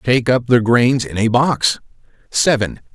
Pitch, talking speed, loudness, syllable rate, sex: 120 Hz, 165 wpm, -16 LUFS, 4.5 syllables/s, male